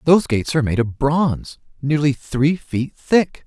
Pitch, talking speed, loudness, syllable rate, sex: 145 Hz, 175 wpm, -19 LUFS, 4.8 syllables/s, male